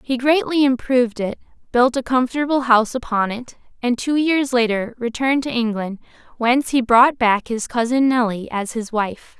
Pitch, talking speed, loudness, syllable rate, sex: 245 Hz, 170 wpm, -19 LUFS, 5.1 syllables/s, female